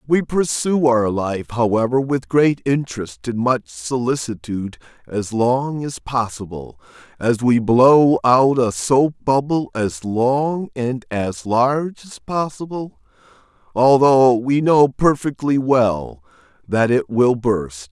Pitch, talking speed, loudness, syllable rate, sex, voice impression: 130 Hz, 125 wpm, -18 LUFS, 3.6 syllables/s, male, masculine, adult-like, slightly powerful, slightly wild